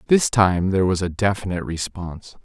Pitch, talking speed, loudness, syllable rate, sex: 95 Hz, 170 wpm, -21 LUFS, 5.9 syllables/s, male